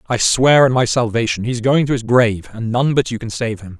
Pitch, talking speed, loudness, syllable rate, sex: 120 Hz, 270 wpm, -16 LUFS, 5.5 syllables/s, male